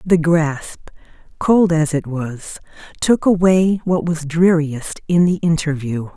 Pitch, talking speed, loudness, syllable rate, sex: 165 Hz, 135 wpm, -17 LUFS, 3.6 syllables/s, female